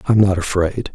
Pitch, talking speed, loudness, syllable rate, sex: 100 Hz, 190 wpm, -17 LUFS, 5.2 syllables/s, male